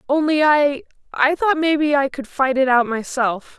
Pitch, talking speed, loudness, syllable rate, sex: 280 Hz, 165 wpm, -18 LUFS, 4.6 syllables/s, female